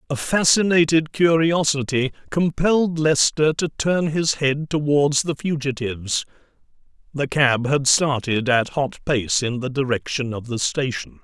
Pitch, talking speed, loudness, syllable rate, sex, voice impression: 145 Hz, 135 wpm, -20 LUFS, 4.3 syllables/s, male, masculine, adult-like, slightly thin, tensed, powerful, slightly bright, clear, fluent, cool, intellectual, friendly, wild, lively